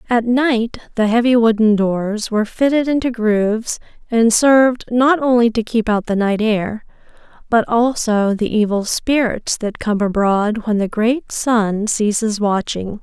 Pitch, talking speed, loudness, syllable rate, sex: 225 Hz, 155 wpm, -16 LUFS, 4.1 syllables/s, female